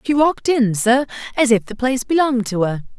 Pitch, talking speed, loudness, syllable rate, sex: 245 Hz, 220 wpm, -18 LUFS, 6.2 syllables/s, female